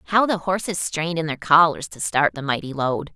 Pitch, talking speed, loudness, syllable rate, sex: 160 Hz, 230 wpm, -21 LUFS, 5.2 syllables/s, female